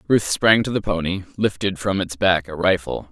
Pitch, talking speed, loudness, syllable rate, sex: 95 Hz, 210 wpm, -20 LUFS, 5.0 syllables/s, male